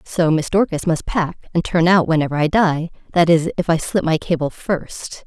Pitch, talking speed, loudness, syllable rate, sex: 165 Hz, 215 wpm, -18 LUFS, 4.9 syllables/s, female